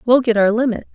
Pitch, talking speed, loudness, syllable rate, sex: 230 Hz, 255 wpm, -16 LUFS, 6.4 syllables/s, female